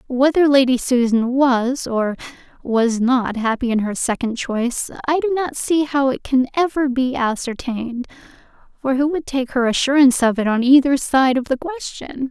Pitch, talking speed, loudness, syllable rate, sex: 260 Hz, 175 wpm, -18 LUFS, 4.8 syllables/s, female